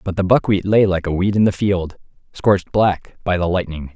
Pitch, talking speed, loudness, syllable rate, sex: 95 Hz, 230 wpm, -18 LUFS, 5.2 syllables/s, male